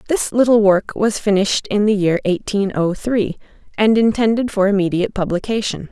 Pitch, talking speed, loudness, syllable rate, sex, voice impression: 205 Hz, 160 wpm, -17 LUFS, 5.4 syllables/s, female, very feminine, slightly adult-like, thin, tensed, slightly powerful, bright, soft, clear, fluent, slightly raspy, cute, intellectual, refreshing, slightly sincere, calm, friendly, slightly reassuring, unique, elegant, wild, sweet, lively, slightly strict, intense, slightly sharp, light